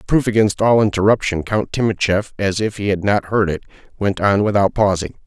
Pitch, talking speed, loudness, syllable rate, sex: 100 Hz, 195 wpm, -17 LUFS, 5.4 syllables/s, male